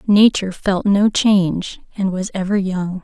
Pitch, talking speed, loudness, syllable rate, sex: 190 Hz, 160 wpm, -17 LUFS, 4.4 syllables/s, female